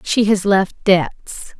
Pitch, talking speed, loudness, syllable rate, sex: 195 Hz, 150 wpm, -16 LUFS, 2.9 syllables/s, female